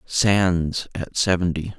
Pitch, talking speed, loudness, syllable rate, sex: 90 Hz, 100 wpm, -21 LUFS, 3.1 syllables/s, male